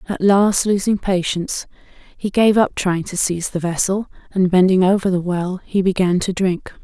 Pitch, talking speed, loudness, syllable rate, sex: 190 Hz, 185 wpm, -18 LUFS, 4.9 syllables/s, female